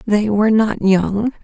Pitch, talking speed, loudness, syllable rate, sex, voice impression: 210 Hz, 165 wpm, -16 LUFS, 4.1 syllables/s, female, very feminine, very adult-like, slightly middle-aged, thin, slightly relaxed, slightly weak, slightly dark, hard, clear, fluent, slightly raspy, cool, very intellectual, slightly refreshing, sincere, very calm, slightly friendly, slightly reassuring, elegant, slightly sweet, slightly lively, kind, slightly modest